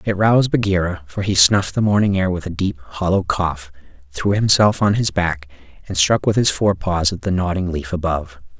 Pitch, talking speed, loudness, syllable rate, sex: 90 Hz, 210 wpm, -18 LUFS, 5.3 syllables/s, male